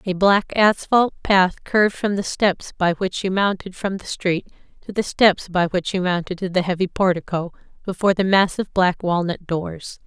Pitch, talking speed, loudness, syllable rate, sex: 185 Hz, 190 wpm, -20 LUFS, 5.0 syllables/s, female